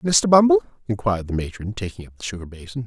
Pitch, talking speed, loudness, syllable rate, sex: 105 Hz, 210 wpm, -20 LUFS, 6.8 syllables/s, male